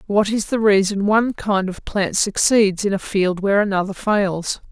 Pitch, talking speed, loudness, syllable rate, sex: 200 Hz, 190 wpm, -18 LUFS, 4.7 syllables/s, female